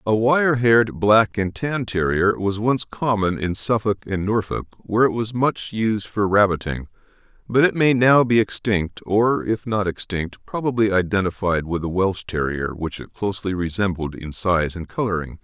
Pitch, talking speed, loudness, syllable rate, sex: 100 Hz, 175 wpm, -21 LUFS, 4.6 syllables/s, male